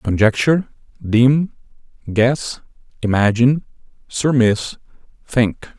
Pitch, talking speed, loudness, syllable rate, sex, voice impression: 120 Hz, 60 wpm, -17 LUFS, 4.1 syllables/s, male, masculine, adult-like, tensed, clear, fluent, cool, intellectual, sincere, calm, slightly mature, friendly, unique, slightly wild, kind